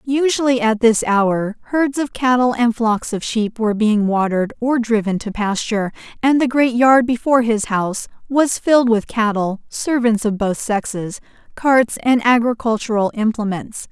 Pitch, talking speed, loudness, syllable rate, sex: 230 Hz, 160 wpm, -17 LUFS, 4.7 syllables/s, female